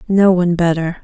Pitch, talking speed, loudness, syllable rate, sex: 175 Hz, 175 wpm, -14 LUFS, 5.8 syllables/s, female